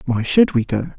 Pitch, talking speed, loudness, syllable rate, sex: 140 Hz, 245 wpm, -17 LUFS, 4.8 syllables/s, male